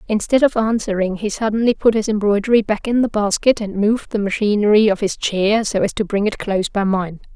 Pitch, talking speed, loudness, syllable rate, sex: 210 Hz, 220 wpm, -17 LUFS, 5.8 syllables/s, female